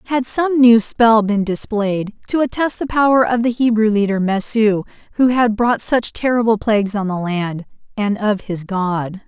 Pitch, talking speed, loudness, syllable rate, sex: 220 Hz, 175 wpm, -16 LUFS, 4.5 syllables/s, female